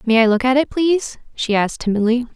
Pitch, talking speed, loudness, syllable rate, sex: 245 Hz, 230 wpm, -17 LUFS, 6.4 syllables/s, female